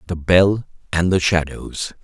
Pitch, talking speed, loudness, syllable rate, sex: 90 Hz, 150 wpm, -18 LUFS, 4.0 syllables/s, male